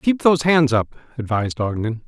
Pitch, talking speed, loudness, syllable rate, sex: 130 Hz, 175 wpm, -19 LUFS, 5.5 syllables/s, male